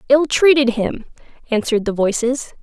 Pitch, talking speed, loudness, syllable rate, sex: 250 Hz, 135 wpm, -17 LUFS, 5.1 syllables/s, female